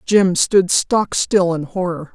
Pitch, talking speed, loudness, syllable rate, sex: 180 Hz, 170 wpm, -17 LUFS, 3.4 syllables/s, female